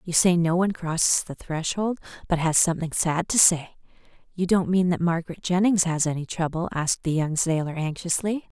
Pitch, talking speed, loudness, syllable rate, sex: 170 Hz, 190 wpm, -23 LUFS, 5.4 syllables/s, female